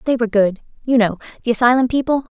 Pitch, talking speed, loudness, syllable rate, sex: 235 Hz, 180 wpm, -17 LUFS, 7.3 syllables/s, female